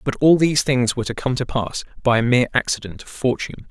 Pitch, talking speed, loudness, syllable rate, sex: 125 Hz, 245 wpm, -19 LUFS, 7.0 syllables/s, male